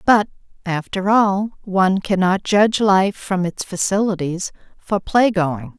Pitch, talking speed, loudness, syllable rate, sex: 190 Hz, 125 wpm, -18 LUFS, 4.0 syllables/s, female